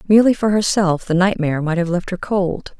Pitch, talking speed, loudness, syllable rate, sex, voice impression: 185 Hz, 215 wpm, -17 LUFS, 5.7 syllables/s, female, feminine, adult-like, tensed, powerful, slightly dark, clear, slightly fluent, intellectual, calm, slightly reassuring, elegant, modest